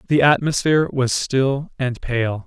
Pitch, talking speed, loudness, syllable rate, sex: 130 Hz, 145 wpm, -19 LUFS, 4.1 syllables/s, male